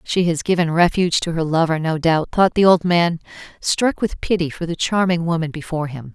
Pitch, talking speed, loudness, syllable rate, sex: 170 Hz, 215 wpm, -18 LUFS, 5.5 syllables/s, female